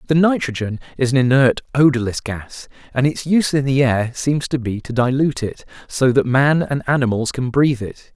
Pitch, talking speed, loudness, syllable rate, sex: 130 Hz, 200 wpm, -18 LUFS, 5.3 syllables/s, male